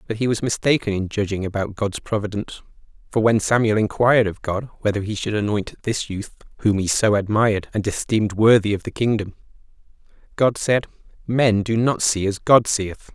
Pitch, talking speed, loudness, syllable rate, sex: 105 Hz, 185 wpm, -20 LUFS, 5.4 syllables/s, male